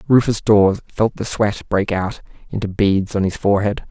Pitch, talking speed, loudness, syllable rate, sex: 100 Hz, 185 wpm, -18 LUFS, 5.1 syllables/s, male